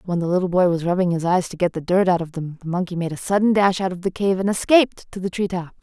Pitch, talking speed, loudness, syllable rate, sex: 180 Hz, 320 wpm, -20 LUFS, 6.6 syllables/s, female